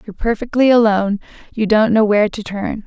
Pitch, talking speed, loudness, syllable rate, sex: 215 Hz, 190 wpm, -16 LUFS, 6.1 syllables/s, female